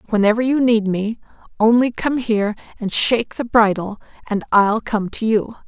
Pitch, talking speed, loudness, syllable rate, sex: 220 Hz, 170 wpm, -18 LUFS, 4.9 syllables/s, female